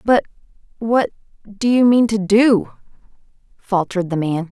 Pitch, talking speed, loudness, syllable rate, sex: 210 Hz, 105 wpm, -17 LUFS, 4.5 syllables/s, female